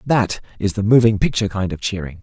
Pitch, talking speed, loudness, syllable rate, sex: 105 Hz, 215 wpm, -18 LUFS, 6.2 syllables/s, male